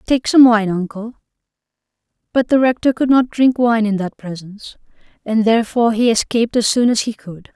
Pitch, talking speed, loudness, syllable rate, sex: 225 Hz, 185 wpm, -15 LUFS, 5.5 syllables/s, female